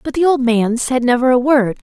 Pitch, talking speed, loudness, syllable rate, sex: 255 Hz, 250 wpm, -15 LUFS, 5.2 syllables/s, female